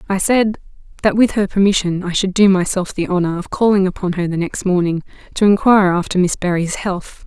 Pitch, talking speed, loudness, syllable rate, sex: 190 Hz, 205 wpm, -16 LUFS, 5.7 syllables/s, female